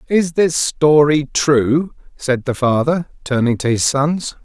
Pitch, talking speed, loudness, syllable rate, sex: 145 Hz, 150 wpm, -16 LUFS, 3.6 syllables/s, male